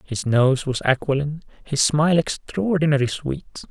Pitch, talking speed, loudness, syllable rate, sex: 145 Hz, 130 wpm, -21 LUFS, 4.8 syllables/s, male